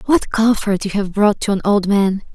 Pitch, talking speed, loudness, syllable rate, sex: 205 Hz, 230 wpm, -16 LUFS, 4.8 syllables/s, female